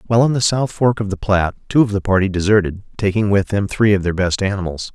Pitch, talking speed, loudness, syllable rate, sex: 100 Hz, 255 wpm, -17 LUFS, 6.4 syllables/s, male